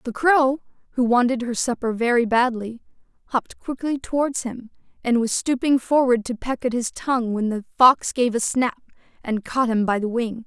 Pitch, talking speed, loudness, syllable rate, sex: 245 Hz, 190 wpm, -21 LUFS, 5.0 syllables/s, female